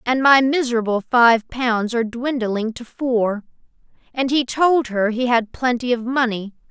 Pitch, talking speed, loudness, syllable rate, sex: 240 Hz, 160 wpm, -19 LUFS, 4.4 syllables/s, female